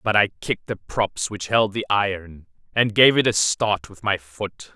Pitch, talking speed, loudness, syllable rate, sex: 100 Hz, 215 wpm, -21 LUFS, 4.4 syllables/s, male